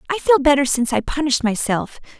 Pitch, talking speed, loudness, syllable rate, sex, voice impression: 275 Hz, 190 wpm, -18 LUFS, 7.0 syllables/s, female, feminine, slightly young, tensed, powerful, bright, clear, fluent, cute, slightly refreshing, friendly, slightly sharp